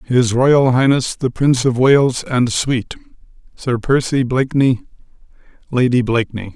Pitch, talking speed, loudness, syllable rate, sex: 125 Hz, 130 wpm, -16 LUFS, 4.6 syllables/s, male